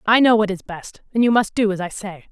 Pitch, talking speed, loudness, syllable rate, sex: 210 Hz, 310 wpm, -19 LUFS, 5.9 syllables/s, female